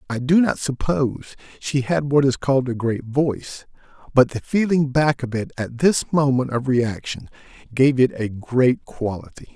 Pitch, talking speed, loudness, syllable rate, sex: 135 Hz, 175 wpm, -20 LUFS, 4.6 syllables/s, male